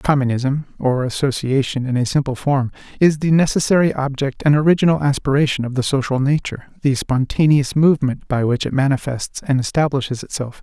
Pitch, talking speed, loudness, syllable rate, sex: 140 Hz, 145 wpm, -18 LUFS, 5.7 syllables/s, male